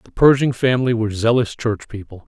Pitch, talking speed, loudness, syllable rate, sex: 115 Hz, 180 wpm, -18 LUFS, 6.1 syllables/s, male